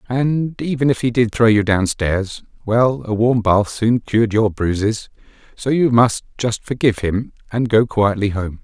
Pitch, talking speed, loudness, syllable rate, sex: 115 Hz, 180 wpm, -17 LUFS, 4.4 syllables/s, male